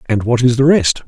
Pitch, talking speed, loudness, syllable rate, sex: 125 Hz, 280 wpm, -13 LUFS, 5.7 syllables/s, male